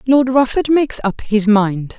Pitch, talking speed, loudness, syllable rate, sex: 235 Hz, 180 wpm, -15 LUFS, 4.4 syllables/s, female